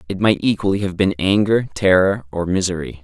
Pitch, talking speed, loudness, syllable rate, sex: 95 Hz, 180 wpm, -18 LUFS, 5.6 syllables/s, male